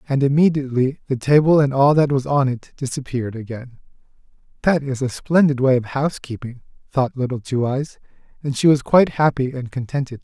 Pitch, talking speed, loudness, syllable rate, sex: 135 Hz, 175 wpm, -19 LUFS, 5.8 syllables/s, male